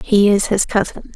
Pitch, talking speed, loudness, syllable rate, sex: 205 Hz, 210 wpm, -16 LUFS, 4.8 syllables/s, female